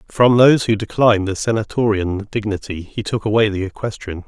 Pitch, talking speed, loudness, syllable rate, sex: 105 Hz, 170 wpm, -17 LUFS, 5.7 syllables/s, male